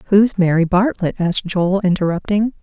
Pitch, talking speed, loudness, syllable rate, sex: 190 Hz, 135 wpm, -17 LUFS, 5.2 syllables/s, female